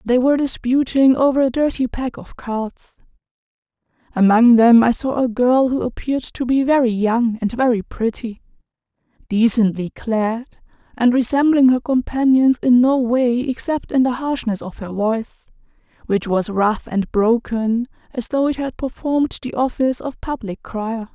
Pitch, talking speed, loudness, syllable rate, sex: 245 Hz, 155 wpm, -18 LUFS, 4.6 syllables/s, female